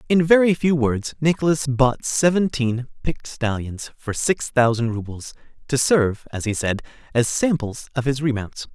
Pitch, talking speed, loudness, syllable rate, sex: 135 Hz, 150 wpm, -21 LUFS, 4.7 syllables/s, male